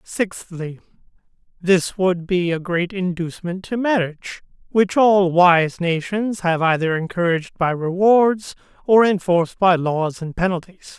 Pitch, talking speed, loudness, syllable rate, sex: 180 Hz, 130 wpm, -19 LUFS, 4.2 syllables/s, male